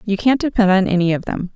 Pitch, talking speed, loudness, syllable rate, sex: 200 Hz, 270 wpm, -17 LUFS, 6.3 syllables/s, female